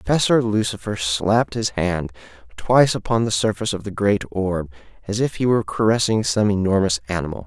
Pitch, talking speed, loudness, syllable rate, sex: 100 Hz, 170 wpm, -20 LUFS, 5.9 syllables/s, male